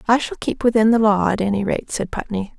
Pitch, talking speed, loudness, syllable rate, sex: 210 Hz, 255 wpm, -19 LUFS, 5.9 syllables/s, female